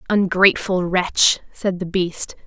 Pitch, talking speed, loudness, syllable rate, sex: 190 Hz, 120 wpm, -18 LUFS, 3.9 syllables/s, female